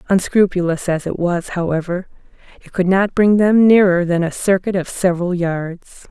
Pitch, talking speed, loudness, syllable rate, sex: 180 Hz, 165 wpm, -16 LUFS, 4.8 syllables/s, female